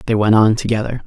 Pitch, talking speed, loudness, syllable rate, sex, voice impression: 110 Hz, 225 wpm, -15 LUFS, 6.6 syllables/s, male, masculine, adult-like, tensed, slightly bright, fluent, slightly intellectual, sincere, slightly calm, friendly, unique, slightly kind, slightly modest